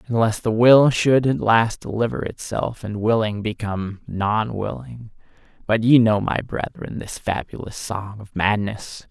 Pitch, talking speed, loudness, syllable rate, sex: 110 Hz, 150 wpm, -21 LUFS, 4.2 syllables/s, male